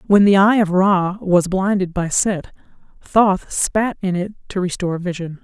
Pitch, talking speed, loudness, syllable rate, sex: 190 Hz, 175 wpm, -18 LUFS, 4.3 syllables/s, female